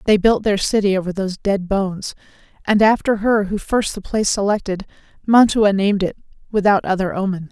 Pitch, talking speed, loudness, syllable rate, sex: 200 Hz, 175 wpm, -18 LUFS, 5.7 syllables/s, female